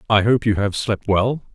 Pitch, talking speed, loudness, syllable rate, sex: 105 Hz, 235 wpm, -19 LUFS, 4.9 syllables/s, male